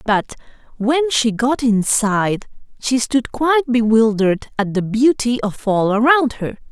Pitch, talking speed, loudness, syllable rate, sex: 235 Hz, 145 wpm, -17 LUFS, 4.3 syllables/s, female